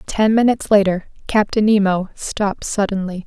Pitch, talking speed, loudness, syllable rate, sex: 205 Hz, 130 wpm, -17 LUFS, 5.2 syllables/s, female